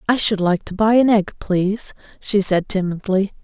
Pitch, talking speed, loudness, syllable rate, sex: 200 Hz, 190 wpm, -18 LUFS, 4.8 syllables/s, female